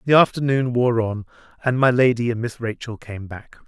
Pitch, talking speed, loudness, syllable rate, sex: 120 Hz, 195 wpm, -20 LUFS, 5.2 syllables/s, male